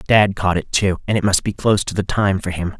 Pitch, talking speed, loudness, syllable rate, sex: 95 Hz, 300 wpm, -18 LUFS, 5.8 syllables/s, male